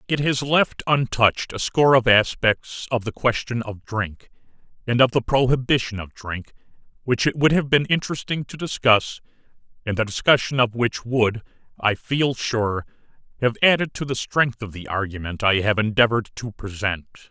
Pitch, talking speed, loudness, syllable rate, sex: 120 Hz, 170 wpm, -21 LUFS, 5.0 syllables/s, male